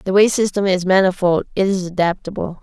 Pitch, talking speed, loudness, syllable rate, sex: 185 Hz, 185 wpm, -17 LUFS, 5.9 syllables/s, female